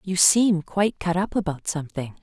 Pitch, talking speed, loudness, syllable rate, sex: 180 Hz, 190 wpm, -22 LUFS, 5.3 syllables/s, female